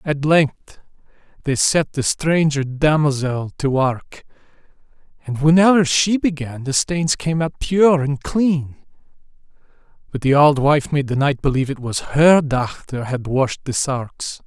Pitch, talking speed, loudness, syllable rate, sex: 145 Hz, 150 wpm, -18 LUFS, 4.0 syllables/s, male